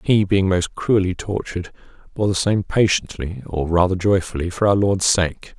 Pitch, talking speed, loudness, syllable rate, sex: 95 Hz, 170 wpm, -19 LUFS, 4.8 syllables/s, male